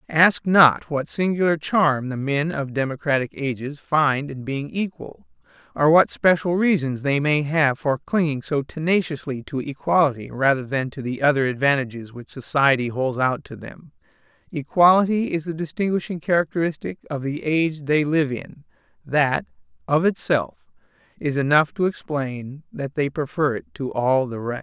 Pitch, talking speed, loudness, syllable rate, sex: 150 Hz, 160 wpm, -21 LUFS, 4.7 syllables/s, male